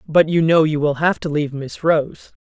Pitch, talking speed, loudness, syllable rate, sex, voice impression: 155 Hz, 245 wpm, -18 LUFS, 5.0 syllables/s, female, feminine, adult-like, tensed, powerful, bright, fluent, intellectual, friendly, unique, lively, kind, slightly intense, light